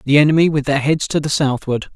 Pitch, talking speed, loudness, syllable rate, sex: 145 Hz, 245 wpm, -16 LUFS, 6.2 syllables/s, male